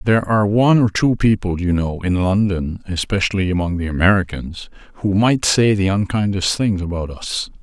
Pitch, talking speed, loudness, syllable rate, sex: 100 Hz, 175 wpm, -18 LUFS, 5.3 syllables/s, male